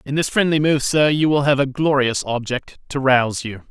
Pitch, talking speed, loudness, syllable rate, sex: 140 Hz, 225 wpm, -18 LUFS, 5.2 syllables/s, male